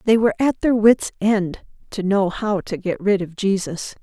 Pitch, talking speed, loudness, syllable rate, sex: 200 Hz, 210 wpm, -20 LUFS, 4.6 syllables/s, female